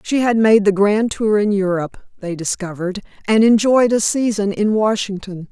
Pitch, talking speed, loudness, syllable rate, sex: 205 Hz, 175 wpm, -16 LUFS, 5.0 syllables/s, female